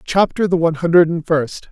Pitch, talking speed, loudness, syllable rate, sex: 165 Hz, 210 wpm, -16 LUFS, 5.6 syllables/s, male